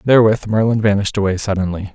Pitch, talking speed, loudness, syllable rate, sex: 100 Hz, 155 wpm, -16 LUFS, 7.1 syllables/s, male